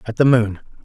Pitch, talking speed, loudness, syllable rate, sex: 115 Hz, 215 wpm, -17 LUFS, 5.8 syllables/s, male